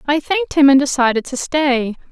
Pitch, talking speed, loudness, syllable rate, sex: 280 Hz, 200 wpm, -15 LUFS, 5.5 syllables/s, female